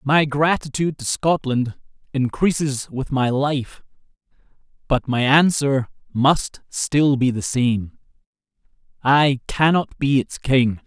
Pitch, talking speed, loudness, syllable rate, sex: 135 Hz, 110 wpm, -20 LUFS, 3.7 syllables/s, male